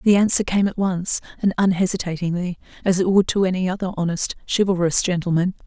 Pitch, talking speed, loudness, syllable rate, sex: 185 Hz, 170 wpm, -20 LUFS, 6.1 syllables/s, female